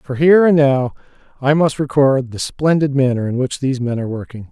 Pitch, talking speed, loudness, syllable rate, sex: 135 Hz, 210 wpm, -16 LUFS, 5.8 syllables/s, male